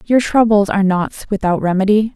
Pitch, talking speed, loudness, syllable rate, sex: 205 Hz, 165 wpm, -15 LUFS, 5.5 syllables/s, female